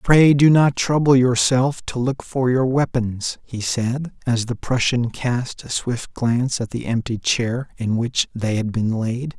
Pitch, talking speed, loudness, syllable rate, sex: 125 Hz, 185 wpm, -20 LUFS, 3.9 syllables/s, male